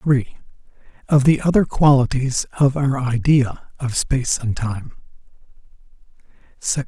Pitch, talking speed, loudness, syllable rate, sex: 135 Hz, 115 wpm, -19 LUFS, 4.2 syllables/s, male